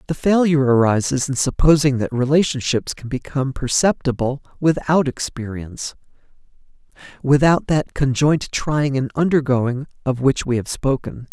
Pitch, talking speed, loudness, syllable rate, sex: 135 Hz, 115 wpm, -19 LUFS, 4.9 syllables/s, male